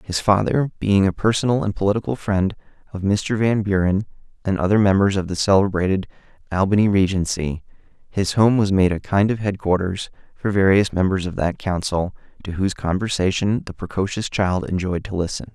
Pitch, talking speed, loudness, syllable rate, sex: 95 Hz, 165 wpm, -20 LUFS, 5.5 syllables/s, male